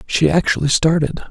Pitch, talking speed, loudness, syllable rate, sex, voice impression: 155 Hz, 140 wpm, -16 LUFS, 5.0 syllables/s, male, masculine, adult-like, slightly raspy, slightly sincere, calm, friendly, slightly reassuring